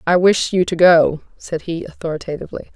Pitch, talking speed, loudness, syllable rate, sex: 170 Hz, 175 wpm, -17 LUFS, 5.7 syllables/s, female